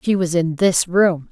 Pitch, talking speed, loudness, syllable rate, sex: 175 Hz, 230 wpm, -17 LUFS, 4.1 syllables/s, female